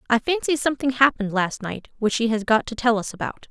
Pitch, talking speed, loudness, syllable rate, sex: 235 Hz, 240 wpm, -22 LUFS, 6.2 syllables/s, female